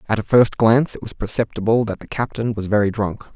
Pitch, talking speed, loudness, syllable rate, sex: 110 Hz, 235 wpm, -19 LUFS, 6.2 syllables/s, male